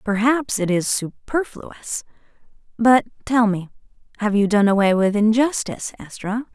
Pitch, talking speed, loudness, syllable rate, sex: 220 Hz, 110 wpm, -20 LUFS, 4.5 syllables/s, female